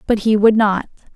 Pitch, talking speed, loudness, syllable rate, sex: 210 Hz, 205 wpm, -15 LUFS, 5.1 syllables/s, female